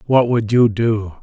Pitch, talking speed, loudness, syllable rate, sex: 115 Hz, 195 wpm, -16 LUFS, 3.8 syllables/s, male